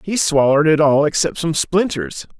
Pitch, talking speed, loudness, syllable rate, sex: 150 Hz, 175 wpm, -16 LUFS, 5.0 syllables/s, male